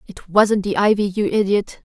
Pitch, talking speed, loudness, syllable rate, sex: 200 Hz, 190 wpm, -18 LUFS, 4.8 syllables/s, female